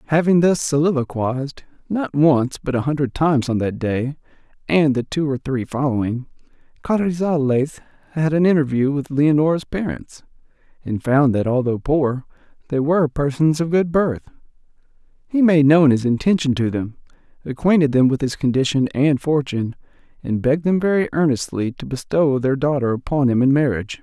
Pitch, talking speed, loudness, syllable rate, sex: 140 Hz, 155 wpm, -19 LUFS, 5.2 syllables/s, male